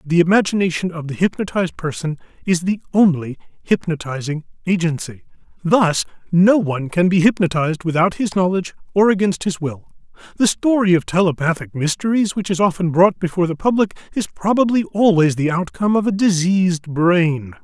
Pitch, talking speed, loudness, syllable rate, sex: 180 Hz, 155 wpm, -18 LUFS, 5.6 syllables/s, male